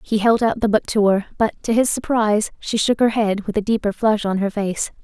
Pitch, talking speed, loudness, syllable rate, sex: 215 Hz, 260 wpm, -19 LUFS, 5.3 syllables/s, female